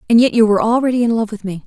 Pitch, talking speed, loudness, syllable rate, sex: 225 Hz, 325 wpm, -15 LUFS, 8.1 syllables/s, female